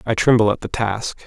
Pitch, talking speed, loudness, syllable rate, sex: 110 Hz, 240 wpm, -19 LUFS, 5.2 syllables/s, male